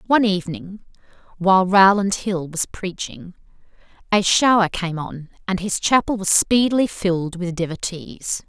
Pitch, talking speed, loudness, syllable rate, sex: 190 Hz, 135 wpm, -19 LUFS, 4.7 syllables/s, female